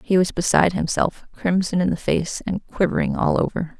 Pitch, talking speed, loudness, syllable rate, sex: 180 Hz, 190 wpm, -21 LUFS, 5.3 syllables/s, female